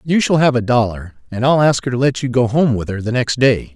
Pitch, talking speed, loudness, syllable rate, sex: 125 Hz, 305 wpm, -16 LUFS, 5.7 syllables/s, male